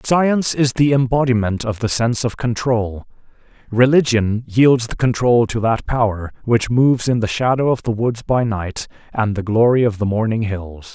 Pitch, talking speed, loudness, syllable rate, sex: 115 Hz, 180 wpm, -17 LUFS, 4.8 syllables/s, male